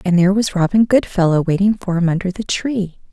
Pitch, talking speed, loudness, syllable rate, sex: 190 Hz, 210 wpm, -16 LUFS, 5.8 syllables/s, female